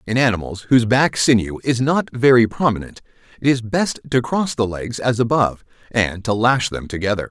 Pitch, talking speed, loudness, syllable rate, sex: 120 Hz, 190 wpm, -18 LUFS, 5.4 syllables/s, male